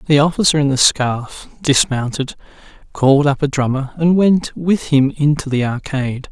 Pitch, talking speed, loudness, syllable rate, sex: 140 Hz, 160 wpm, -16 LUFS, 4.7 syllables/s, male